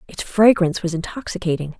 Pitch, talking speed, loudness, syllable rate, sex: 180 Hz, 135 wpm, -19 LUFS, 6.2 syllables/s, female